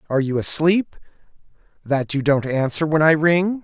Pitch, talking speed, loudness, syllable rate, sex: 155 Hz, 165 wpm, -19 LUFS, 5.0 syllables/s, male